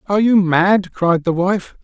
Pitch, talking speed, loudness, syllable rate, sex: 185 Hz, 195 wpm, -15 LUFS, 4.2 syllables/s, male